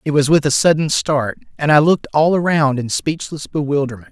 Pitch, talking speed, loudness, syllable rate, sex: 145 Hz, 205 wpm, -16 LUFS, 5.6 syllables/s, male